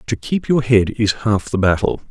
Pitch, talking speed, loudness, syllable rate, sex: 110 Hz, 230 wpm, -17 LUFS, 4.7 syllables/s, male